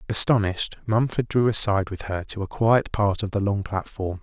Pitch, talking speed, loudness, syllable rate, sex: 105 Hz, 200 wpm, -23 LUFS, 5.3 syllables/s, male